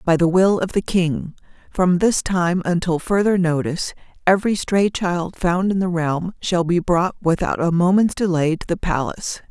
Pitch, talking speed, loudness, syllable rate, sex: 175 Hz, 185 wpm, -19 LUFS, 4.7 syllables/s, female